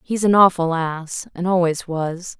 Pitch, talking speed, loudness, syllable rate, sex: 175 Hz, 150 wpm, -19 LUFS, 4.1 syllables/s, female